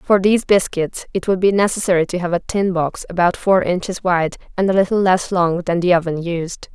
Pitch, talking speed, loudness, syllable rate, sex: 180 Hz, 220 wpm, -18 LUFS, 5.3 syllables/s, female